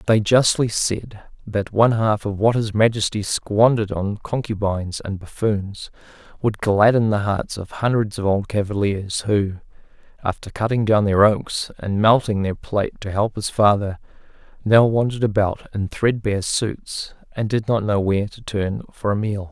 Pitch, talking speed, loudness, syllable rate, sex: 105 Hz, 165 wpm, -20 LUFS, 4.7 syllables/s, male